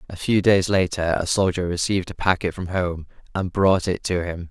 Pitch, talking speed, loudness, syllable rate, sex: 90 Hz, 215 wpm, -22 LUFS, 5.2 syllables/s, male